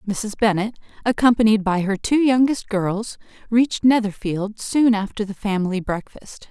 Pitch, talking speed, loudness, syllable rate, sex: 215 Hz, 140 wpm, -20 LUFS, 4.8 syllables/s, female